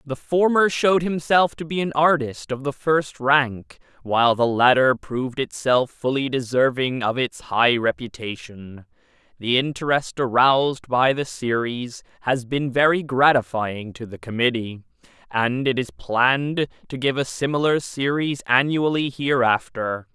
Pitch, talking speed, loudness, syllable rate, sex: 130 Hz, 140 wpm, -21 LUFS, 4.3 syllables/s, male